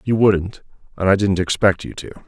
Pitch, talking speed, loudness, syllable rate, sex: 100 Hz, 210 wpm, -18 LUFS, 5.3 syllables/s, male